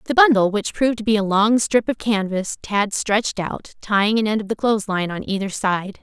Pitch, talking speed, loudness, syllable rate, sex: 210 Hz, 240 wpm, -20 LUFS, 5.4 syllables/s, female